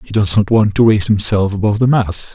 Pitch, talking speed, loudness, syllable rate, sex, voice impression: 100 Hz, 255 wpm, -13 LUFS, 6.2 syllables/s, male, masculine, very adult-like, slightly fluent, sincere, friendly, slightly reassuring